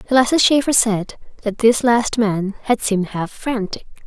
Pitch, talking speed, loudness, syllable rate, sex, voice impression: 225 Hz, 160 wpm, -18 LUFS, 4.9 syllables/s, female, feminine, slightly young, tensed, slightly bright, clear, fluent, slightly cute, unique, lively, slightly strict, sharp, slightly light